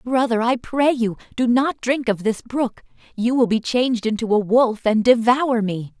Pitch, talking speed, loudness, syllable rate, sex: 235 Hz, 200 wpm, -19 LUFS, 4.4 syllables/s, female